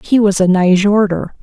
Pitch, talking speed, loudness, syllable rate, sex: 195 Hz, 170 wpm, -12 LUFS, 4.8 syllables/s, female